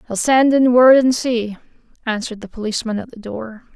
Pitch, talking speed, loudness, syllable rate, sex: 235 Hz, 190 wpm, -16 LUFS, 5.6 syllables/s, female